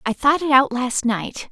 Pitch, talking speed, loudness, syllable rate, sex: 260 Hz, 240 wpm, -19 LUFS, 4.3 syllables/s, female